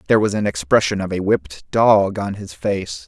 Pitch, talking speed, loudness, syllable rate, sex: 100 Hz, 215 wpm, -19 LUFS, 5.2 syllables/s, male